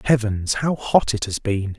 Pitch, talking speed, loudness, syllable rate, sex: 115 Hz, 200 wpm, -21 LUFS, 4.2 syllables/s, male